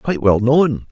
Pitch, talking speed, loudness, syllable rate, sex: 130 Hz, 200 wpm, -15 LUFS, 4.7 syllables/s, male